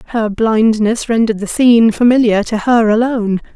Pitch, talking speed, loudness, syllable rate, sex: 225 Hz, 150 wpm, -13 LUFS, 5.4 syllables/s, female